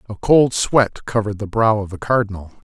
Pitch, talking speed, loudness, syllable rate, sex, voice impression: 110 Hz, 200 wpm, -18 LUFS, 5.5 syllables/s, male, very masculine, very adult-like, middle-aged, very thick, tensed, powerful, slightly bright, slightly soft, slightly muffled, fluent, slightly raspy, very cool, very intellectual, sincere, very calm, very mature, friendly, very reassuring, unique, very wild, slightly sweet, lively, kind, slightly intense